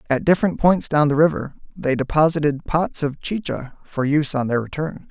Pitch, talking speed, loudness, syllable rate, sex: 150 Hz, 190 wpm, -20 LUFS, 5.5 syllables/s, male